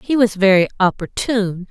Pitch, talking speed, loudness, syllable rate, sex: 205 Hz, 140 wpm, -16 LUFS, 5.1 syllables/s, female